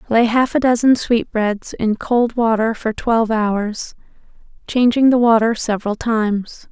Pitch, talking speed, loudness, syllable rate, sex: 225 Hz, 145 wpm, -17 LUFS, 4.3 syllables/s, female